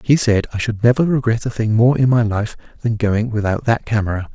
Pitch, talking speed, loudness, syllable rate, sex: 115 Hz, 235 wpm, -17 LUFS, 5.6 syllables/s, male